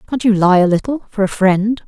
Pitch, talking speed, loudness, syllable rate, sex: 205 Hz, 255 wpm, -15 LUFS, 5.4 syllables/s, female